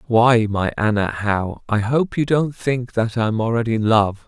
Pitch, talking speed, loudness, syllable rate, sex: 115 Hz, 210 wpm, -19 LUFS, 5.1 syllables/s, male